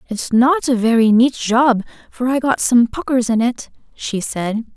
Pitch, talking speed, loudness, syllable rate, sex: 240 Hz, 190 wpm, -16 LUFS, 4.2 syllables/s, female